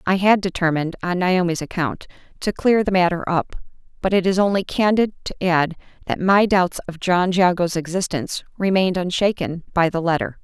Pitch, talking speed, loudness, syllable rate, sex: 180 Hz, 170 wpm, -20 LUFS, 5.4 syllables/s, female